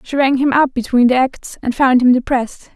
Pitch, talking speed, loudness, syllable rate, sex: 260 Hz, 240 wpm, -15 LUFS, 5.4 syllables/s, female